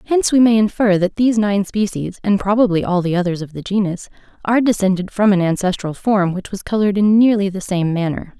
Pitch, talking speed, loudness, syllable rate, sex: 200 Hz, 215 wpm, -17 LUFS, 6.0 syllables/s, female